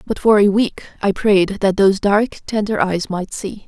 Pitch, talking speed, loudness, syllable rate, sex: 200 Hz, 215 wpm, -17 LUFS, 4.8 syllables/s, female